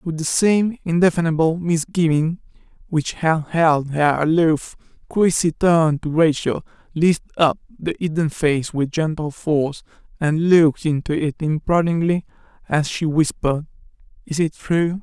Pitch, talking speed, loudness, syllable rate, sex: 160 Hz, 130 wpm, -19 LUFS, 4.4 syllables/s, male